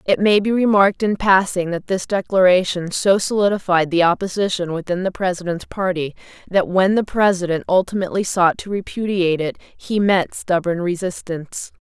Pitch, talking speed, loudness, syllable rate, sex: 185 Hz, 150 wpm, -18 LUFS, 5.3 syllables/s, female